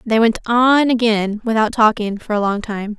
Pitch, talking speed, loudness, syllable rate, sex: 220 Hz, 200 wpm, -16 LUFS, 4.7 syllables/s, female